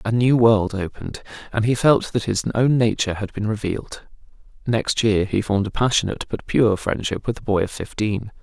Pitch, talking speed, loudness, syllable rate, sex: 110 Hz, 200 wpm, -21 LUFS, 5.5 syllables/s, male